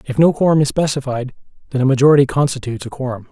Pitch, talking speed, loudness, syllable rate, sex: 135 Hz, 200 wpm, -16 LUFS, 7.5 syllables/s, male